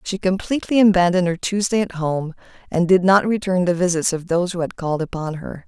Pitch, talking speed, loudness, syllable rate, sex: 180 Hz, 210 wpm, -19 LUFS, 6.1 syllables/s, female